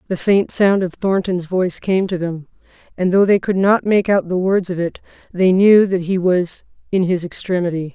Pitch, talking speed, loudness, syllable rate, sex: 185 Hz, 210 wpm, -17 LUFS, 4.9 syllables/s, female